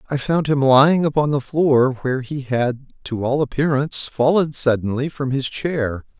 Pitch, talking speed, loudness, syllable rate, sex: 135 Hz, 175 wpm, -19 LUFS, 4.7 syllables/s, male